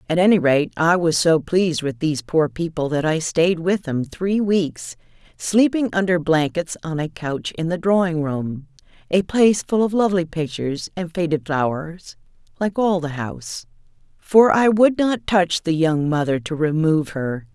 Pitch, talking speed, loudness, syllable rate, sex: 170 Hz, 180 wpm, -20 LUFS, 4.6 syllables/s, female